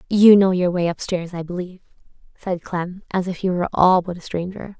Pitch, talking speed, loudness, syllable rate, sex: 180 Hz, 215 wpm, -20 LUFS, 5.4 syllables/s, female